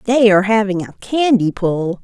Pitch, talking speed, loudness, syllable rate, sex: 205 Hz, 175 wpm, -15 LUFS, 4.8 syllables/s, female